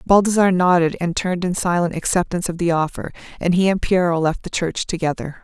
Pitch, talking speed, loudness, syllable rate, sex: 175 Hz, 200 wpm, -19 LUFS, 6.2 syllables/s, female